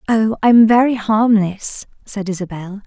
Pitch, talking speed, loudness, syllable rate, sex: 210 Hz, 125 wpm, -15 LUFS, 4.1 syllables/s, female